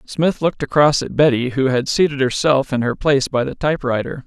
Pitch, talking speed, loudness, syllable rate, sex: 140 Hz, 210 wpm, -17 LUFS, 5.8 syllables/s, male